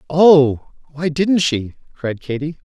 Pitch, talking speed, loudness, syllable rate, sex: 150 Hz, 135 wpm, -17 LUFS, 3.4 syllables/s, male